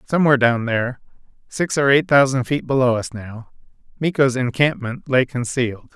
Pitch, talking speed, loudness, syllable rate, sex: 130 Hz, 130 wpm, -19 LUFS, 5.4 syllables/s, male